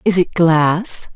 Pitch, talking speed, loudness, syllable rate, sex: 175 Hz, 155 wpm, -15 LUFS, 2.9 syllables/s, female